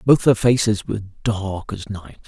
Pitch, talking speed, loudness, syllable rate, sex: 105 Hz, 185 wpm, -20 LUFS, 4.3 syllables/s, male